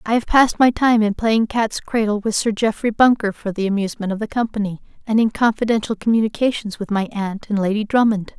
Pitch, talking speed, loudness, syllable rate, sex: 215 Hz, 210 wpm, -19 LUFS, 5.9 syllables/s, female